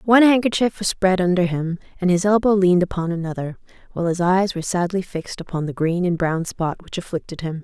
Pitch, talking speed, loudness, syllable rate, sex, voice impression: 180 Hz, 210 wpm, -20 LUFS, 6.3 syllables/s, female, feminine, adult-like, tensed, powerful, slightly hard, clear, fluent, intellectual, elegant, lively, sharp